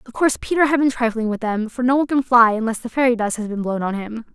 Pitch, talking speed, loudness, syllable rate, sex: 235 Hz, 305 wpm, -19 LUFS, 6.7 syllables/s, female